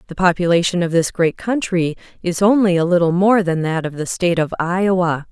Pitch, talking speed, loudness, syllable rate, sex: 175 Hz, 205 wpm, -17 LUFS, 5.6 syllables/s, female